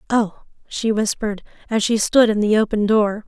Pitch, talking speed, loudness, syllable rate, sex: 215 Hz, 185 wpm, -19 LUFS, 5.1 syllables/s, female